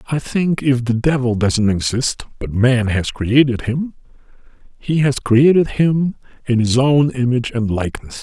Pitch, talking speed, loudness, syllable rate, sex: 130 Hz, 160 wpm, -17 LUFS, 4.5 syllables/s, male